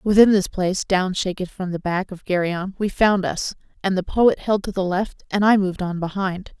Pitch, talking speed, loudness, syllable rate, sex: 190 Hz, 225 wpm, -21 LUFS, 5.0 syllables/s, female